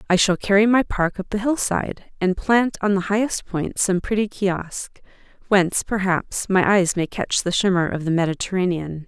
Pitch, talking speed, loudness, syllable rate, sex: 190 Hz, 185 wpm, -21 LUFS, 5.0 syllables/s, female